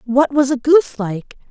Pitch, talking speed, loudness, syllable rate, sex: 265 Hz, 200 wpm, -16 LUFS, 4.7 syllables/s, female